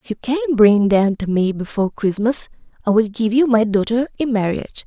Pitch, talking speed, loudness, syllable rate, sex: 225 Hz, 210 wpm, -18 LUFS, 5.5 syllables/s, female